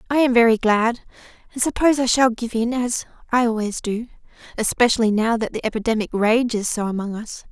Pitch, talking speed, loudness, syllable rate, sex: 230 Hz, 185 wpm, -20 LUFS, 5.8 syllables/s, female